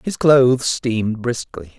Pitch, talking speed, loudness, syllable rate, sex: 125 Hz, 135 wpm, -17 LUFS, 4.1 syllables/s, male